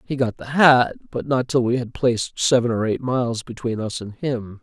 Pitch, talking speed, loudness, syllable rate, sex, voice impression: 120 Hz, 235 wpm, -21 LUFS, 5.1 syllables/s, male, very masculine, very adult-like, slightly thick, slightly tensed, slightly powerful, slightly bright, slightly soft, clear, fluent, cool, very intellectual, very refreshing, sincere, calm, slightly mature, very friendly, very reassuring, unique, elegant, slightly wild, slightly sweet, lively, strict, slightly intense